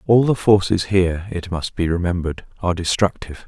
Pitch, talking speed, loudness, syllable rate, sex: 90 Hz, 175 wpm, -19 LUFS, 6.0 syllables/s, male